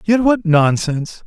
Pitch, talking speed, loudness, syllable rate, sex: 180 Hz, 140 wpm, -15 LUFS, 4.3 syllables/s, male